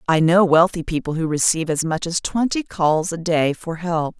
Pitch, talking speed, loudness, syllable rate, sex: 165 Hz, 215 wpm, -19 LUFS, 5.0 syllables/s, female